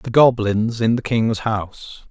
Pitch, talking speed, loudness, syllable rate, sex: 110 Hz, 170 wpm, -18 LUFS, 4.2 syllables/s, male